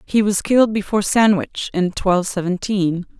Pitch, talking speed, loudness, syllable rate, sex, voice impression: 195 Hz, 150 wpm, -18 LUFS, 5.1 syllables/s, female, feminine, adult-like, slightly middle-aged, slightly thin, tensed, powerful, slightly bright, hard, clear, fluent, cool, very intellectual, refreshing, very sincere, very calm, friendly, slightly reassuring, slightly unique, elegant, slightly wild, slightly sweet, slightly strict